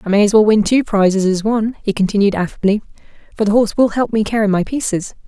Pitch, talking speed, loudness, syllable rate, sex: 210 Hz, 240 wpm, -15 LUFS, 6.7 syllables/s, female